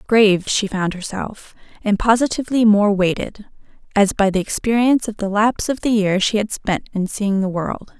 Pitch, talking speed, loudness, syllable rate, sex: 210 Hz, 190 wpm, -18 LUFS, 5.1 syllables/s, female